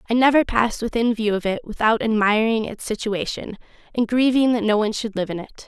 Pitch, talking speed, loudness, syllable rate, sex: 220 Hz, 210 wpm, -21 LUFS, 6.1 syllables/s, female